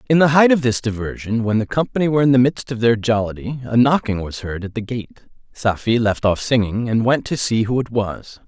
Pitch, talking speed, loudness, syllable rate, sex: 120 Hz, 240 wpm, -18 LUFS, 5.5 syllables/s, male